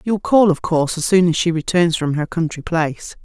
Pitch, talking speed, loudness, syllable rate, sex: 170 Hz, 240 wpm, -17 LUFS, 5.5 syllables/s, female